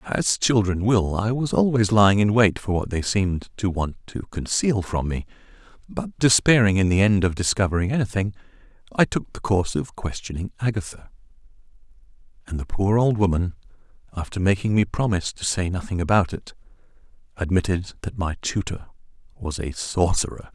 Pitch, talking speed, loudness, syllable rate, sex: 100 Hz, 160 wpm, -22 LUFS, 5.4 syllables/s, male